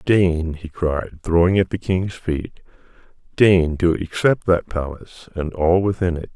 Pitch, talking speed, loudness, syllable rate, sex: 85 Hz, 160 wpm, -20 LUFS, 4.1 syllables/s, male